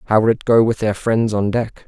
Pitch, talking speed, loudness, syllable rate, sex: 110 Hz, 290 wpm, -17 LUFS, 5.4 syllables/s, male